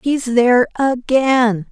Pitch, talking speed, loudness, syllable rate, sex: 245 Hz, 105 wpm, -15 LUFS, 3.3 syllables/s, female